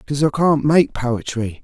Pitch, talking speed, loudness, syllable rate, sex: 135 Hz, 185 wpm, -18 LUFS, 5.6 syllables/s, male